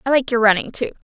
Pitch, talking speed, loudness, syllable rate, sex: 240 Hz, 270 wpm, -18 LUFS, 7.2 syllables/s, female